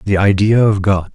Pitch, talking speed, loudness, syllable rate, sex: 100 Hz, 210 wpm, -13 LUFS, 5.0 syllables/s, male